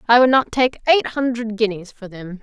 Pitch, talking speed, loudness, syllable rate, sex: 230 Hz, 225 wpm, -17 LUFS, 5.4 syllables/s, female